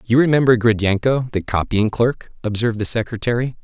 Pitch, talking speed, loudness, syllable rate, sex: 115 Hz, 150 wpm, -18 LUFS, 5.6 syllables/s, male